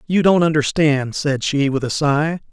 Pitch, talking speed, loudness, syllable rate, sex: 150 Hz, 190 wpm, -17 LUFS, 4.4 syllables/s, male